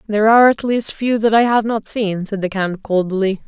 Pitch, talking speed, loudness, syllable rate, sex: 210 Hz, 240 wpm, -16 LUFS, 5.2 syllables/s, female